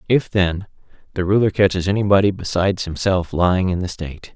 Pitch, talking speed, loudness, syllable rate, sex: 95 Hz, 165 wpm, -19 LUFS, 6.0 syllables/s, male